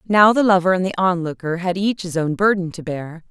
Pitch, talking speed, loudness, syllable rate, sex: 180 Hz, 235 wpm, -19 LUFS, 5.4 syllables/s, female